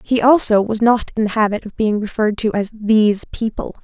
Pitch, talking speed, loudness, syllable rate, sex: 215 Hz, 220 wpm, -17 LUFS, 5.5 syllables/s, female